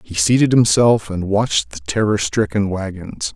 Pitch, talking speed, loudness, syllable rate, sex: 100 Hz, 160 wpm, -17 LUFS, 4.6 syllables/s, male